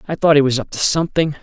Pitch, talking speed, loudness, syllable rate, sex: 145 Hz, 295 wpm, -16 LUFS, 7.3 syllables/s, male